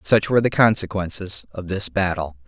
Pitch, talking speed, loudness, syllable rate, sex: 95 Hz, 170 wpm, -21 LUFS, 5.4 syllables/s, male